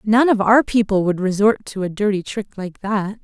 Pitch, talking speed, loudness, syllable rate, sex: 205 Hz, 220 wpm, -18 LUFS, 5.0 syllables/s, female